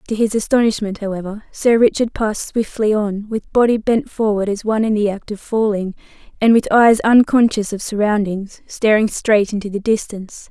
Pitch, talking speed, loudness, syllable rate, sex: 215 Hz, 175 wpm, -17 LUFS, 5.2 syllables/s, female